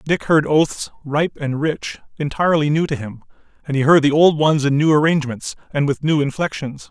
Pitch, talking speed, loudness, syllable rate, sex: 150 Hz, 200 wpm, -18 LUFS, 5.3 syllables/s, male